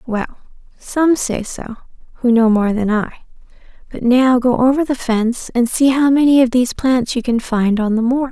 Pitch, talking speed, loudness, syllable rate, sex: 245 Hz, 200 wpm, -15 LUFS, 4.9 syllables/s, female